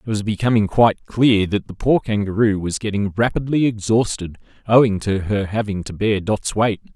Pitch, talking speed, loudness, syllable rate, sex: 105 Hz, 180 wpm, -19 LUFS, 5.3 syllables/s, male